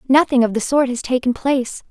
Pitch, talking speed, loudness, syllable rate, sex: 255 Hz, 220 wpm, -18 LUFS, 5.9 syllables/s, female